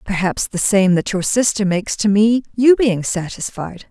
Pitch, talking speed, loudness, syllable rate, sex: 205 Hz, 185 wpm, -16 LUFS, 4.6 syllables/s, female